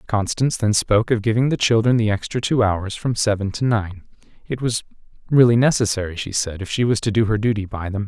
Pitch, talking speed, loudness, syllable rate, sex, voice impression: 110 Hz, 225 wpm, -19 LUFS, 6.0 syllables/s, male, masculine, adult-like, tensed, slightly powerful, bright, clear, slightly raspy, cool, intellectual, calm, friendly, reassuring, slightly wild, lively